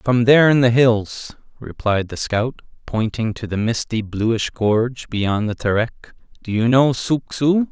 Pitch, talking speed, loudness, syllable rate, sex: 120 Hz, 170 wpm, -19 LUFS, 4.1 syllables/s, male